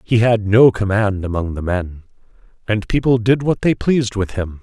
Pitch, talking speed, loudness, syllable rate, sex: 105 Hz, 195 wpm, -17 LUFS, 4.9 syllables/s, male